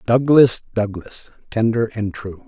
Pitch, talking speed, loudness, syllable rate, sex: 110 Hz, 120 wpm, -18 LUFS, 3.9 syllables/s, male